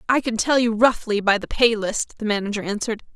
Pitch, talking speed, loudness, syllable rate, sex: 220 Hz, 230 wpm, -21 LUFS, 6.0 syllables/s, female